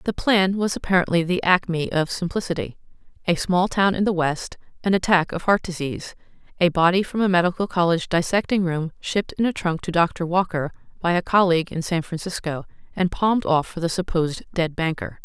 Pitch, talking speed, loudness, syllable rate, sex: 175 Hz, 190 wpm, -22 LUFS, 5.8 syllables/s, female